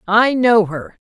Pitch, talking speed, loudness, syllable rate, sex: 215 Hz, 170 wpm, -15 LUFS, 3.5 syllables/s, female